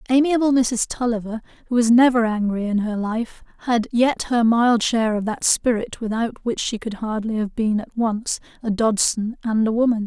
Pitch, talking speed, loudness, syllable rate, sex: 230 Hz, 190 wpm, -20 LUFS, 4.9 syllables/s, female